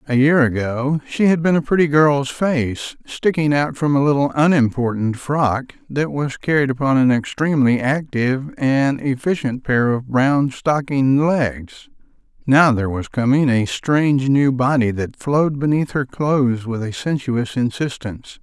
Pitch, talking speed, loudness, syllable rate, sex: 135 Hz, 155 wpm, -18 LUFS, 4.5 syllables/s, male